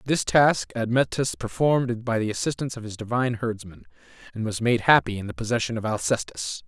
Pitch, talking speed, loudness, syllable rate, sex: 120 Hz, 180 wpm, -24 LUFS, 5.9 syllables/s, male